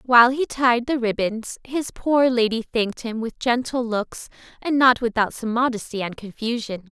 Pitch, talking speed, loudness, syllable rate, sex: 235 Hz, 175 wpm, -22 LUFS, 4.8 syllables/s, female